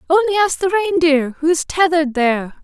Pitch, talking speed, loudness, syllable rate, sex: 325 Hz, 180 wpm, -16 LUFS, 6.5 syllables/s, female